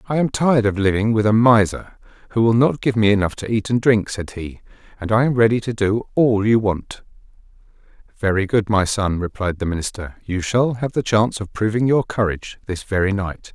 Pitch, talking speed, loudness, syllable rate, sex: 110 Hz, 215 wpm, -19 LUFS, 5.5 syllables/s, male